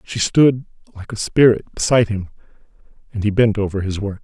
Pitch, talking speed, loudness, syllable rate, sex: 110 Hz, 185 wpm, -17 LUFS, 5.8 syllables/s, male